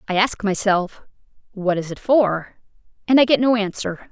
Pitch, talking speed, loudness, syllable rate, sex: 205 Hz, 175 wpm, -19 LUFS, 4.7 syllables/s, female